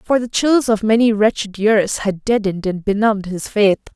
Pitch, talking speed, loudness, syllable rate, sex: 210 Hz, 195 wpm, -17 LUFS, 5.1 syllables/s, female